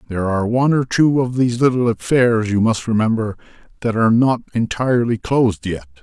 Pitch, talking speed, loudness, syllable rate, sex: 115 Hz, 180 wpm, -17 LUFS, 6.1 syllables/s, male